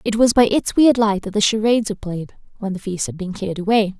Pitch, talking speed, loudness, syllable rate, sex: 205 Hz, 270 wpm, -18 LUFS, 6.3 syllables/s, female